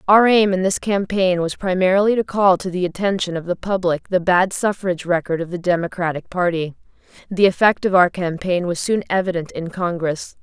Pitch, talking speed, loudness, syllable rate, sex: 185 Hz, 190 wpm, -19 LUFS, 5.4 syllables/s, female